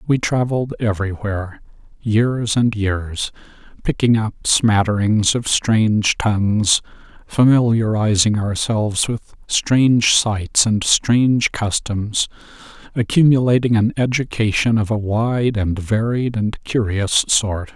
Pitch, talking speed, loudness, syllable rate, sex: 110 Hz, 100 wpm, -17 LUFS, 3.9 syllables/s, male